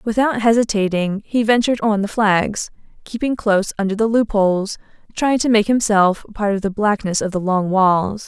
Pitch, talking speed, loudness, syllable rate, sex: 210 Hz, 175 wpm, -18 LUFS, 5.1 syllables/s, female